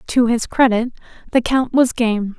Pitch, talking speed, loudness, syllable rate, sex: 235 Hz, 175 wpm, -17 LUFS, 4.4 syllables/s, female